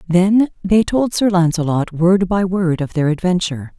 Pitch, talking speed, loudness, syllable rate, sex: 180 Hz, 175 wpm, -16 LUFS, 4.6 syllables/s, female